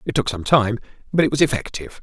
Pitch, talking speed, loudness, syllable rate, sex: 125 Hz, 235 wpm, -20 LUFS, 7.0 syllables/s, male